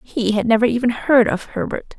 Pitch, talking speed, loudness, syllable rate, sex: 230 Hz, 210 wpm, -18 LUFS, 5.3 syllables/s, female